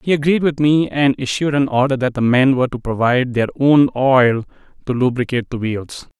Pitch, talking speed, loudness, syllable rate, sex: 130 Hz, 205 wpm, -16 LUFS, 5.6 syllables/s, male